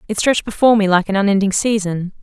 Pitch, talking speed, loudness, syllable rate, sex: 205 Hz, 215 wpm, -16 LUFS, 7.0 syllables/s, female